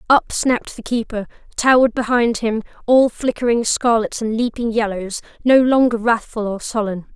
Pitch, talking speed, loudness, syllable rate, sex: 230 Hz, 145 wpm, -18 LUFS, 5.0 syllables/s, female